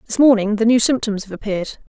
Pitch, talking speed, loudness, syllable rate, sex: 220 Hz, 215 wpm, -17 LUFS, 6.6 syllables/s, female